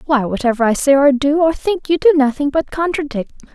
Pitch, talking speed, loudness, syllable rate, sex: 285 Hz, 220 wpm, -15 LUFS, 5.7 syllables/s, female